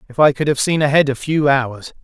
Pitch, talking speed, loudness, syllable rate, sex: 140 Hz, 265 wpm, -16 LUFS, 5.6 syllables/s, male